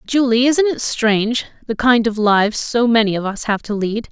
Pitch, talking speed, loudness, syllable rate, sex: 230 Hz, 220 wpm, -16 LUFS, 5.1 syllables/s, female